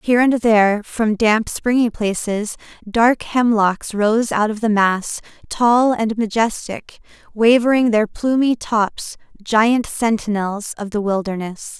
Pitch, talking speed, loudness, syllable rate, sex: 220 Hz, 130 wpm, -17 LUFS, 3.7 syllables/s, female